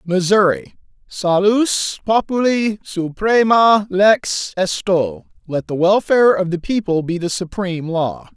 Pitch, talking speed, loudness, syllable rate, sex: 190 Hz, 110 wpm, -17 LUFS, 3.9 syllables/s, male